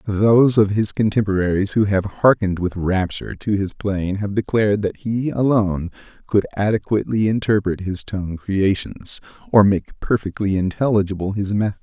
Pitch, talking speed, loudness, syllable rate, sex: 100 Hz, 145 wpm, -19 LUFS, 5.1 syllables/s, male